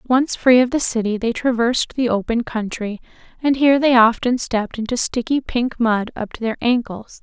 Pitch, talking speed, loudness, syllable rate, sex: 240 Hz, 190 wpm, -18 LUFS, 5.1 syllables/s, female